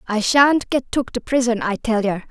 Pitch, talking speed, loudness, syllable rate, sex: 240 Hz, 235 wpm, -19 LUFS, 4.7 syllables/s, female